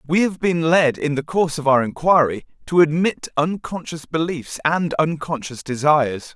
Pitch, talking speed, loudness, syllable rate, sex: 155 Hz, 160 wpm, -19 LUFS, 4.8 syllables/s, male